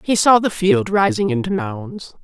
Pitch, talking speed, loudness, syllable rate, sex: 215 Hz, 190 wpm, -17 LUFS, 4.4 syllables/s, female